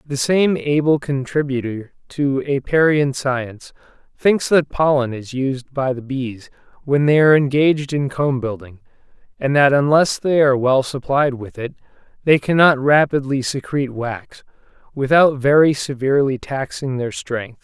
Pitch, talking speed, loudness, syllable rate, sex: 135 Hz, 145 wpm, -18 LUFS, 4.5 syllables/s, male